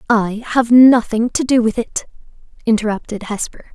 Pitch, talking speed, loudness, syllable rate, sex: 230 Hz, 145 wpm, -16 LUFS, 4.8 syllables/s, female